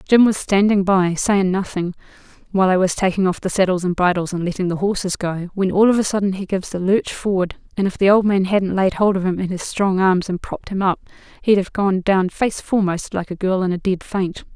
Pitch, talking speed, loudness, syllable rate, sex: 190 Hz, 250 wpm, -19 LUFS, 5.7 syllables/s, female